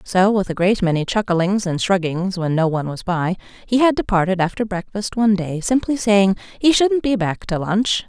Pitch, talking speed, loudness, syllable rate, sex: 195 Hz, 210 wpm, -19 LUFS, 5.0 syllables/s, female